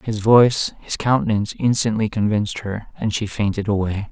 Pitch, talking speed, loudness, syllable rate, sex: 105 Hz, 145 wpm, -19 LUFS, 5.4 syllables/s, male